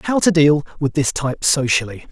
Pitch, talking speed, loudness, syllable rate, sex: 150 Hz, 200 wpm, -17 LUFS, 5.7 syllables/s, male